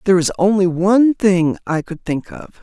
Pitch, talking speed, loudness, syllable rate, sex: 190 Hz, 205 wpm, -16 LUFS, 5.2 syllables/s, female